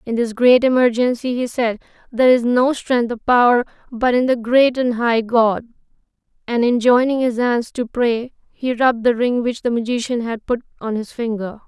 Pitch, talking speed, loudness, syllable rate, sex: 240 Hz, 195 wpm, -18 LUFS, 5.0 syllables/s, female